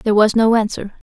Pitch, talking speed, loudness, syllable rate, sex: 220 Hz, 215 wpm, -15 LUFS, 6.1 syllables/s, female